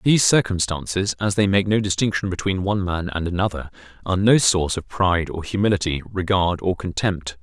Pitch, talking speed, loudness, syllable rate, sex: 95 Hz, 180 wpm, -21 LUFS, 5.8 syllables/s, male